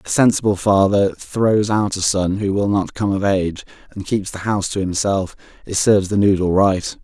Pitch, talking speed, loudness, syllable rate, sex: 100 Hz, 205 wpm, -18 LUFS, 5.1 syllables/s, male